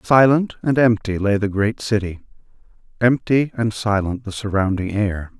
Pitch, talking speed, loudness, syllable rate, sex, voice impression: 110 Hz, 135 wpm, -19 LUFS, 4.6 syllables/s, male, masculine, adult-like, slightly middle-aged, slightly thick, tensed, slightly powerful, slightly bright, hard, slightly clear, fluent, slightly cool, intellectual, very sincere, calm, slightly mature, slightly friendly, slightly reassuring, unique, elegant, slightly wild, slightly sweet, lively, slightly kind, slightly intense